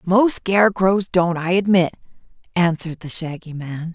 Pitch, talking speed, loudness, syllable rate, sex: 180 Hz, 135 wpm, -19 LUFS, 4.6 syllables/s, female